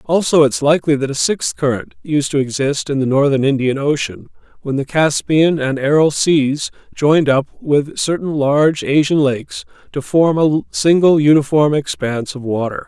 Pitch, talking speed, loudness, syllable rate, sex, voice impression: 145 Hz, 170 wpm, -15 LUFS, 4.8 syllables/s, male, very masculine, very adult-like, middle-aged, thick, tensed, powerful, bright, slightly hard, very clear, fluent, slightly raspy, very cool, intellectual, refreshing, very sincere, calm, mature, very friendly, very reassuring, slightly unique, slightly elegant, wild, sweet, slightly lively, kind